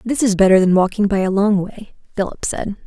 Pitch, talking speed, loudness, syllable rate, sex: 200 Hz, 230 wpm, -16 LUFS, 5.7 syllables/s, female